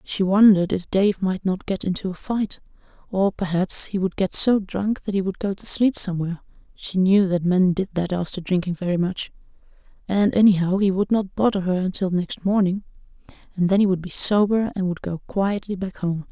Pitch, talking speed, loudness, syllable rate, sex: 190 Hz, 200 wpm, -21 LUFS, 5.3 syllables/s, female